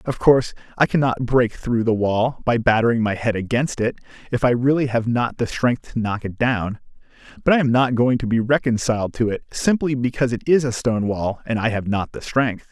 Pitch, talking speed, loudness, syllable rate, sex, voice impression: 120 Hz, 225 wpm, -20 LUFS, 5.4 syllables/s, male, very masculine, very adult-like, middle-aged, very thick, tensed, slightly powerful, very bright, soft, very clear, fluent, cool, very intellectual, refreshing, very sincere, calm, mature, very friendly, very reassuring, unique, very elegant, sweet, very lively, very kind, slightly modest, light